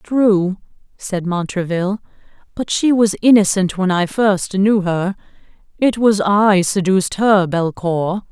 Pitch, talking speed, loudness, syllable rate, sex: 195 Hz, 130 wpm, -16 LUFS, 3.9 syllables/s, female